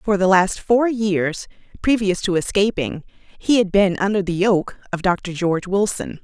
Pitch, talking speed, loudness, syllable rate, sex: 195 Hz, 175 wpm, -19 LUFS, 4.6 syllables/s, female